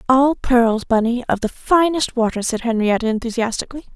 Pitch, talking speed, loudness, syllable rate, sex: 240 Hz, 150 wpm, -18 LUFS, 5.5 syllables/s, female